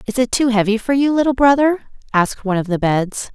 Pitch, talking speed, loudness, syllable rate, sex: 235 Hz, 235 wpm, -17 LUFS, 6.1 syllables/s, female